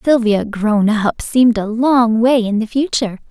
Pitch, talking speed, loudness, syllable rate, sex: 230 Hz, 180 wpm, -15 LUFS, 4.5 syllables/s, female